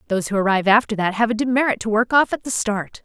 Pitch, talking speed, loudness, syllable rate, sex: 220 Hz, 275 wpm, -19 LUFS, 7.1 syllables/s, female